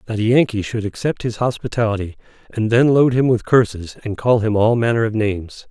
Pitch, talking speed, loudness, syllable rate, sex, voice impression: 110 Hz, 210 wpm, -18 LUFS, 5.7 syllables/s, male, masculine, very adult-like, very middle-aged, thick, slightly tensed, slightly powerful, slightly bright, soft, muffled, fluent, slightly raspy, cool, very intellectual, slightly refreshing, very sincere, calm, mature, friendly, reassuring, slightly unique, slightly elegant, wild, slightly sweet, slightly lively, kind, modest